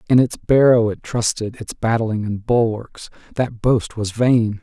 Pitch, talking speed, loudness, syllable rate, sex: 115 Hz, 170 wpm, -18 LUFS, 4.1 syllables/s, male